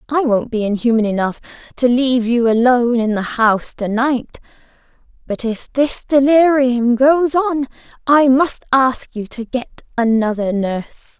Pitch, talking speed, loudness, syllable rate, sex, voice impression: 245 Hz, 150 wpm, -16 LUFS, 4.4 syllables/s, female, feminine, young, slightly tensed, powerful, bright, soft, raspy, cute, friendly, slightly sweet, lively, slightly kind